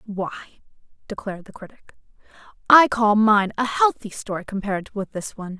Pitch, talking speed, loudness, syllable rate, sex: 210 Hz, 150 wpm, -20 LUFS, 5.7 syllables/s, female